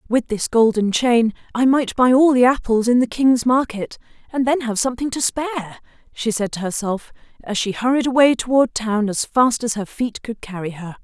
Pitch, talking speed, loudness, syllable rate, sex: 235 Hz, 205 wpm, -19 LUFS, 5.3 syllables/s, female